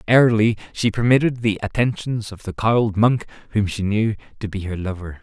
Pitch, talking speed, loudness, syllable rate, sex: 110 Hz, 185 wpm, -20 LUFS, 5.3 syllables/s, male